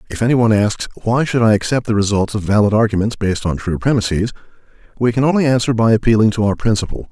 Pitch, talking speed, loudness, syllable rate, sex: 110 Hz, 220 wpm, -16 LUFS, 6.9 syllables/s, male